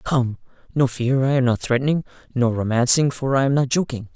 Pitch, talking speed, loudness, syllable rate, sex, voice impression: 130 Hz, 200 wpm, -20 LUFS, 5.6 syllables/s, male, masculine, adult-like, slightly soft, cool, refreshing, slightly calm, kind